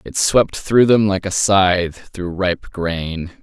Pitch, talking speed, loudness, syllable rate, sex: 95 Hz, 175 wpm, -17 LUFS, 3.5 syllables/s, male